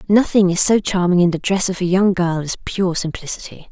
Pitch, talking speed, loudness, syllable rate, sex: 180 Hz, 225 wpm, -17 LUFS, 5.4 syllables/s, female